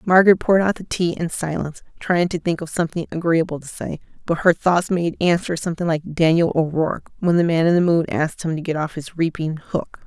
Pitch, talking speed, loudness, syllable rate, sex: 170 Hz, 225 wpm, -20 LUFS, 6.0 syllables/s, female